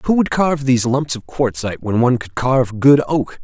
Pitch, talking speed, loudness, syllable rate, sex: 130 Hz, 225 wpm, -17 LUFS, 5.9 syllables/s, male